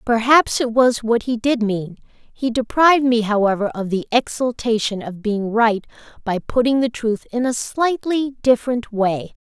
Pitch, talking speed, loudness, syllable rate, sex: 230 Hz, 165 wpm, -19 LUFS, 4.4 syllables/s, female